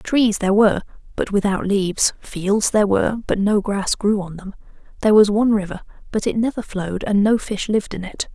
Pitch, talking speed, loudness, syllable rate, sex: 205 Hz, 210 wpm, -19 LUFS, 5.8 syllables/s, female